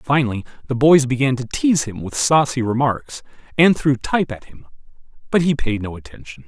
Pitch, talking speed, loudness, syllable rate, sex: 130 Hz, 185 wpm, -18 LUFS, 5.6 syllables/s, male